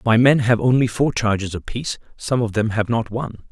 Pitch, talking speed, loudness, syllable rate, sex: 115 Hz, 220 wpm, -20 LUFS, 5.8 syllables/s, male